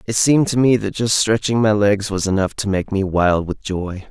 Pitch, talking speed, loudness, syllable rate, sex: 105 Hz, 250 wpm, -18 LUFS, 5.0 syllables/s, male